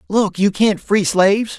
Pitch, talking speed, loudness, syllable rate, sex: 190 Hz, 190 wpm, -16 LUFS, 4.3 syllables/s, male